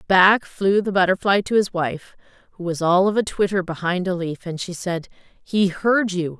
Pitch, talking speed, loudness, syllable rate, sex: 185 Hz, 205 wpm, -20 LUFS, 4.6 syllables/s, female